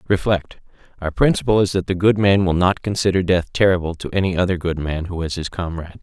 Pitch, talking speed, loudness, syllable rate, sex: 90 Hz, 220 wpm, -19 LUFS, 6.0 syllables/s, male